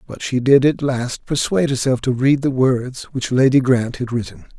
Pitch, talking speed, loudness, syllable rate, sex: 130 Hz, 210 wpm, -18 LUFS, 4.9 syllables/s, male